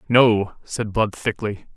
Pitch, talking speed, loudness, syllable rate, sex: 110 Hz, 135 wpm, -21 LUFS, 3.5 syllables/s, male